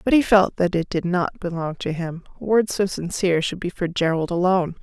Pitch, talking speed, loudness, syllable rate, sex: 180 Hz, 225 wpm, -22 LUFS, 5.4 syllables/s, female